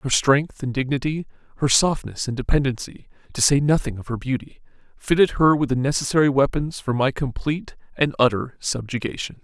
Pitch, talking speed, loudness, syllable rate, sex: 140 Hz, 165 wpm, -21 LUFS, 5.5 syllables/s, male